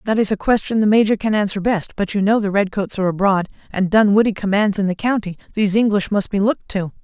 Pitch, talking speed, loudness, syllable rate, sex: 205 Hz, 240 wpm, -18 LUFS, 6.4 syllables/s, female